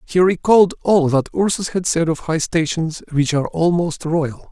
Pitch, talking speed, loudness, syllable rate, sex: 165 Hz, 185 wpm, -18 LUFS, 4.9 syllables/s, male